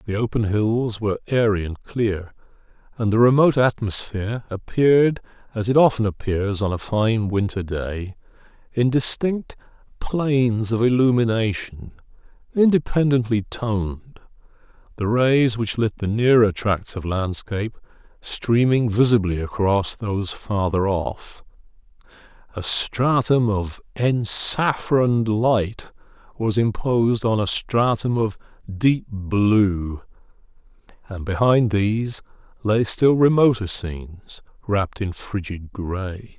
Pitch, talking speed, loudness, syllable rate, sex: 110 Hz, 110 wpm, -20 LUFS, 4.0 syllables/s, male